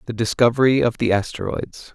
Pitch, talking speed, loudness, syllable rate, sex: 115 Hz, 155 wpm, -19 LUFS, 5.6 syllables/s, male